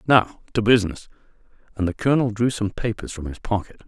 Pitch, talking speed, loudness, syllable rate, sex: 110 Hz, 185 wpm, -22 LUFS, 6.3 syllables/s, male